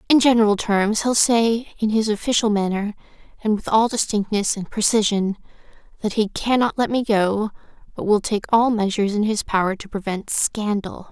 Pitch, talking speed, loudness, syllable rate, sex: 215 Hz, 175 wpm, -20 LUFS, 5.1 syllables/s, female